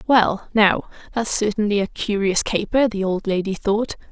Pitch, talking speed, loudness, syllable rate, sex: 205 Hz, 160 wpm, -20 LUFS, 4.6 syllables/s, female